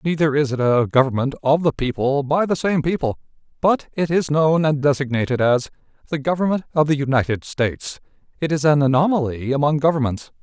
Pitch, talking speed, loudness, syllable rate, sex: 145 Hz, 180 wpm, -19 LUFS, 5.8 syllables/s, male